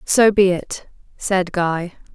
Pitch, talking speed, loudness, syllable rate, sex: 185 Hz, 140 wpm, -18 LUFS, 3.1 syllables/s, female